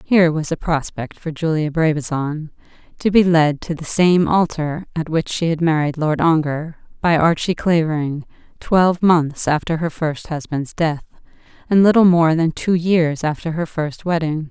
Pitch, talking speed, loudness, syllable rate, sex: 160 Hz, 165 wpm, -18 LUFS, 4.6 syllables/s, female